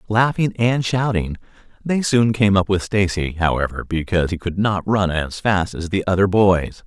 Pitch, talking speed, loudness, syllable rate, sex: 100 Hz, 185 wpm, -19 LUFS, 4.7 syllables/s, male